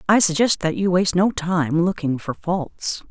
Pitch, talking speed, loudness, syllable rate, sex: 175 Hz, 195 wpm, -20 LUFS, 4.5 syllables/s, female